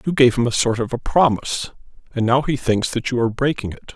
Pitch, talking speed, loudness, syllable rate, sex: 125 Hz, 260 wpm, -19 LUFS, 6.4 syllables/s, male